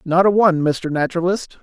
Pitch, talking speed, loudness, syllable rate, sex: 175 Hz, 185 wpm, -17 LUFS, 5.9 syllables/s, male